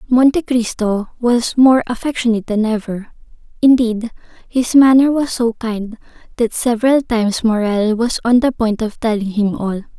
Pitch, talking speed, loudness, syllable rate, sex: 230 Hz, 145 wpm, -15 LUFS, 4.6 syllables/s, female